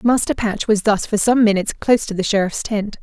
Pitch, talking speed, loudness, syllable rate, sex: 210 Hz, 240 wpm, -18 LUFS, 6.0 syllables/s, female